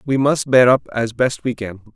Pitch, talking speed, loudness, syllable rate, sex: 125 Hz, 245 wpm, -17 LUFS, 4.8 syllables/s, male